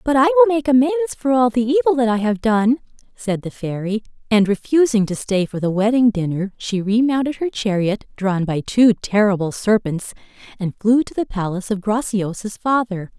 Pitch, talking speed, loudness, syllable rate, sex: 230 Hz, 185 wpm, -18 LUFS, 5.3 syllables/s, female